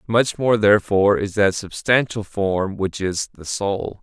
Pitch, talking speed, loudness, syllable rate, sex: 100 Hz, 165 wpm, -20 LUFS, 4.2 syllables/s, male